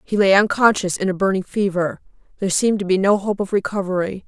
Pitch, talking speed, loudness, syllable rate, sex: 195 Hz, 210 wpm, -19 LUFS, 6.3 syllables/s, female